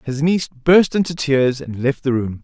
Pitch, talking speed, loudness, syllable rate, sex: 140 Hz, 220 wpm, -17 LUFS, 4.9 syllables/s, male